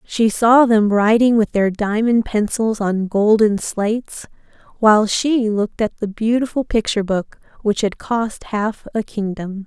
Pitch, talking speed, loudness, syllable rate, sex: 215 Hz, 155 wpm, -17 LUFS, 4.3 syllables/s, female